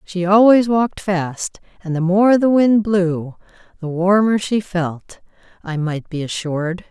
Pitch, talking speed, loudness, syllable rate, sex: 190 Hz, 155 wpm, -17 LUFS, 4.0 syllables/s, female